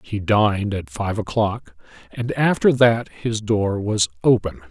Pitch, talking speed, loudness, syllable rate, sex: 105 Hz, 155 wpm, -20 LUFS, 4.0 syllables/s, male